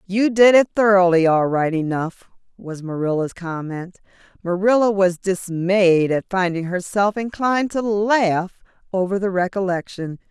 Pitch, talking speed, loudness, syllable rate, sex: 190 Hz, 130 wpm, -19 LUFS, 4.4 syllables/s, female